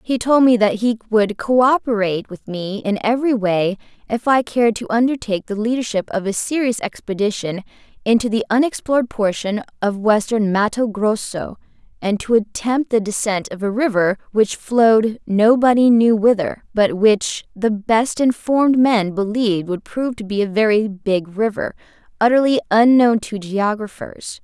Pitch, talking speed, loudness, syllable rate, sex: 220 Hz, 155 wpm, -18 LUFS, 4.9 syllables/s, female